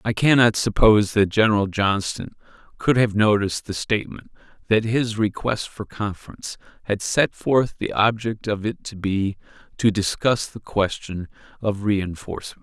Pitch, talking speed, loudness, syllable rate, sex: 105 Hz, 150 wpm, -21 LUFS, 4.8 syllables/s, male